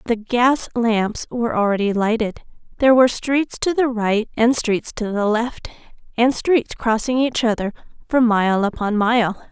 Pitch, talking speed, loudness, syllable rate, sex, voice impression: 230 Hz, 165 wpm, -19 LUFS, 4.5 syllables/s, female, feminine, adult-like, tensed, slightly powerful, bright, soft, slightly halting, slightly nasal, friendly, elegant, sweet, lively, slightly sharp